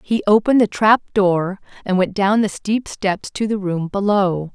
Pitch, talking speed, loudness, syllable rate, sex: 200 Hz, 200 wpm, -18 LUFS, 4.5 syllables/s, female